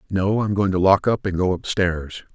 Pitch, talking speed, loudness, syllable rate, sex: 95 Hz, 230 wpm, -20 LUFS, 4.9 syllables/s, male